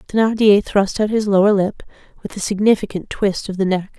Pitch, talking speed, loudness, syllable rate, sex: 200 Hz, 195 wpm, -17 LUFS, 5.5 syllables/s, female